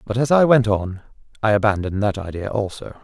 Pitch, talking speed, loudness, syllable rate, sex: 110 Hz, 195 wpm, -19 LUFS, 6.0 syllables/s, male